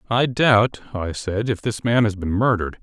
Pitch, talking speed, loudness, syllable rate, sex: 110 Hz, 210 wpm, -20 LUFS, 4.8 syllables/s, male